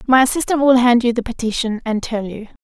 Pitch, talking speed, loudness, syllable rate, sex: 240 Hz, 230 wpm, -17 LUFS, 6.0 syllables/s, female